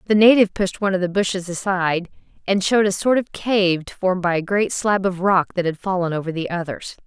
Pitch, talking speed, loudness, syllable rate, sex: 190 Hz, 230 wpm, -20 LUFS, 6.1 syllables/s, female